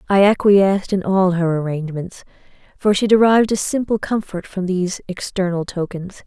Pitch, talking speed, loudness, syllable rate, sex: 190 Hz, 155 wpm, -18 LUFS, 5.3 syllables/s, female